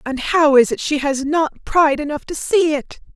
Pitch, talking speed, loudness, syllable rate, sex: 295 Hz, 230 wpm, -17 LUFS, 5.0 syllables/s, female